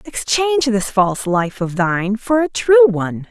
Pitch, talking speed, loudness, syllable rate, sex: 230 Hz, 180 wpm, -16 LUFS, 4.9 syllables/s, female